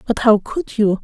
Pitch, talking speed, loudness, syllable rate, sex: 225 Hz, 230 wpm, -17 LUFS, 4.5 syllables/s, female